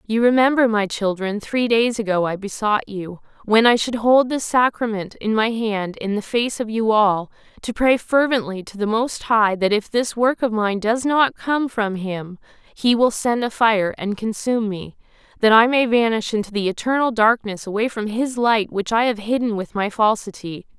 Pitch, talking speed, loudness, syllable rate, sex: 220 Hz, 200 wpm, -19 LUFS, 4.7 syllables/s, female